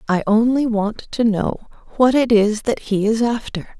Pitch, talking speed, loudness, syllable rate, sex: 220 Hz, 190 wpm, -18 LUFS, 4.5 syllables/s, female